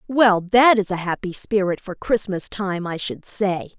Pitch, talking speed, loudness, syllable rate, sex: 200 Hz, 190 wpm, -20 LUFS, 4.2 syllables/s, female